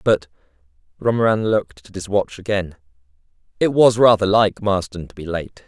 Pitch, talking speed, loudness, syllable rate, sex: 100 Hz, 135 wpm, -18 LUFS, 5.2 syllables/s, male